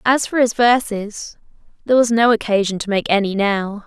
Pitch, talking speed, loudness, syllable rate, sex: 220 Hz, 185 wpm, -17 LUFS, 5.1 syllables/s, female